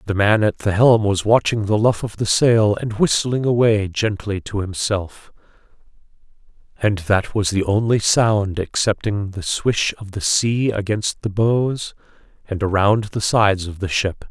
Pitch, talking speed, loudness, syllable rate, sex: 105 Hz, 170 wpm, -19 LUFS, 4.2 syllables/s, male